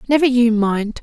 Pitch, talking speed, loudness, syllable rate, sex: 235 Hz, 175 wpm, -16 LUFS, 4.7 syllables/s, female